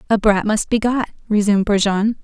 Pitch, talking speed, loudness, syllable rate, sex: 210 Hz, 190 wpm, -17 LUFS, 5.4 syllables/s, female